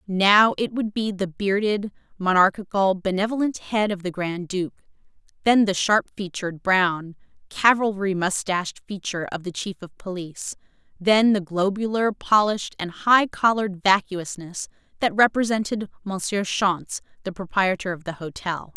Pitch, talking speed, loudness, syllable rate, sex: 195 Hz, 140 wpm, -22 LUFS, 4.7 syllables/s, female